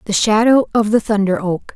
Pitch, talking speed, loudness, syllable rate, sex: 210 Hz, 205 wpm, -15 LUFS, 5.2 syllables/s, female